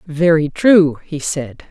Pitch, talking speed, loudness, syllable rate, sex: 160 Hz, 140 wpm, -15 LUFS, 3.3 syllables/s, female